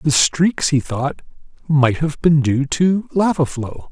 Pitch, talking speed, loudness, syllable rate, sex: 150 Hz, 170 wpm, -17 LUFS, 3.6 syllables/s, male